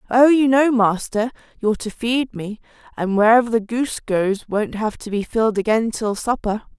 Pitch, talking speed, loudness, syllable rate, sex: 225 Hz, 185 wpm, -19 LUFS, 5.0 syllables/s, female